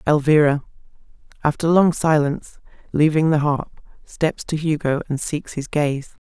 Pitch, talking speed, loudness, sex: 150 Hz, 135 wpm, -20 LUFS, female